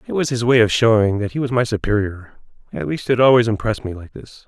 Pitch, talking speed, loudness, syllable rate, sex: 115 Hz, 240 wpm, -18 LUFS, 6.2 syllables/s, male